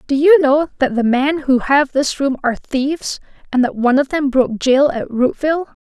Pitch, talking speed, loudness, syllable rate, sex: 275 Hz, 215 wpm, -16 LUFS, 5.4 syllables/s, female